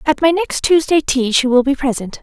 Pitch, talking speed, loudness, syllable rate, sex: 285 Hz, 245 wpm, -15 LUFS, 5.2 syllables/s, female